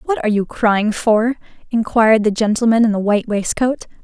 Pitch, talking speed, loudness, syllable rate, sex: 220 Hz, 180 wpm, -16 LUFS, 5.5 syllables/s, female